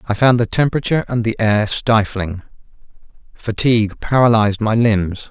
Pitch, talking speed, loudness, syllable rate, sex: 110 Hz, 135 wpm, -16 LUFS, 5.2 syllables/s, male